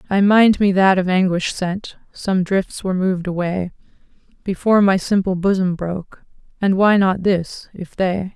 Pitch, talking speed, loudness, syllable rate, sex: 190 Hz, 165 wpm, -18 LUFS, 4.6 syllables/s, female